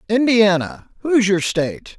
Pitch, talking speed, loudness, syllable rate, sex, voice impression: 205 Hz, 90 wpm, -17 LUFS, 4.2 syllables/s, male, masculine, adult-like, slightly unique, intense